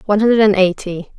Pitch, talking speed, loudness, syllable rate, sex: 200 Hz, 150 wpm, -13 LUFS, 5.8 syllables/s, female